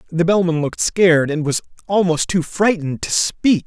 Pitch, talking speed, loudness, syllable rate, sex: 170 Hz, 180 wpm, -17 LUFS, 5.3 syllables/s, male